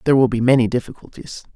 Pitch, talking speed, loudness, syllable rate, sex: 125 Hz, 195 wpm, -17 LUFS, 7.6 syllables/s, female